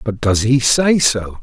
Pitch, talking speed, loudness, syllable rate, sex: 120 Hz, 210 wpm, -14 LUFS, 3.9 syllables/s, male